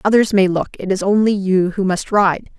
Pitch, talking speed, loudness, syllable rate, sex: 195 Hz, 230 wpm, -16 LUFS, 5.0 syllables/s, female